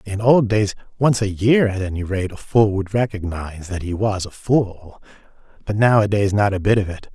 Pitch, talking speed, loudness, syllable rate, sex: 100 Hz, 210 wpm, -19 LUFS, 5.0 syllables/s, male